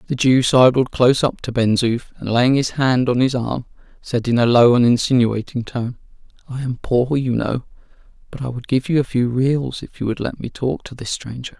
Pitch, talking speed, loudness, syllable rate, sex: 125 Hz, 230 wpm, -18 LUFS, 5.1 syllables/s, male